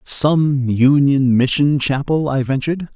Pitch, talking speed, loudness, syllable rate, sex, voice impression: 140 Hz, 120 wpm, -16 LUFS, 3.9 syllables/s, male, very masculine, slightly old, thick, slightly sincere, slightly friendly, wild